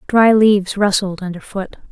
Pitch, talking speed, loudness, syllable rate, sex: 200 Hz, 155 wpm, -15 LUFS, 4.7 syllables/s, female